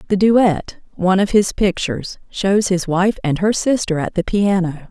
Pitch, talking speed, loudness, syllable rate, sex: 190 Hz, 185 wpm, -17 LUFS, 4.6 syllables/s, female